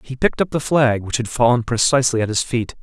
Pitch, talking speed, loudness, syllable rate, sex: 120 Hz, 255 wpm, -18 LUFS, 6.3 syllables/s, male